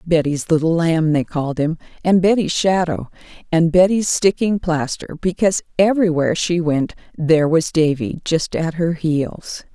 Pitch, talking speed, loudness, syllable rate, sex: 165 Hz, 150 wpm, -18 LUFS, 4.7 syllables/s, female